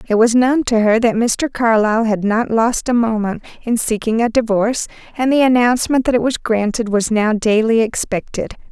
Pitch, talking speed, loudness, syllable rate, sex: 230 Hz, 195 wpm, -16 LUFS, 5.2 syllables/s, female